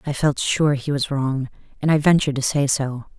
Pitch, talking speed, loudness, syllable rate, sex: 140 Hz, 225 wpm, -20 LUFS, 5.2 syllables/s, female